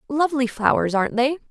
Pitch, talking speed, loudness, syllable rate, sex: 260 Hz, 160 wpm, -21 LUFS, 6.6 syllables/s, female